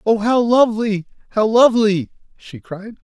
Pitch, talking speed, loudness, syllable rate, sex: 215 Hz, 135 wpm, -16 LUFS, 4.8 syllables/s, male